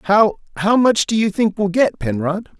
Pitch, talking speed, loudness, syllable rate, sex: 200 Hz, 185 wpm, -17 LUFS, 4.8 syllables/s, male